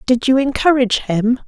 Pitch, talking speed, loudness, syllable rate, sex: 250 Hz, 165 wpm, -15 LUFS, 5.3 syllables/s, female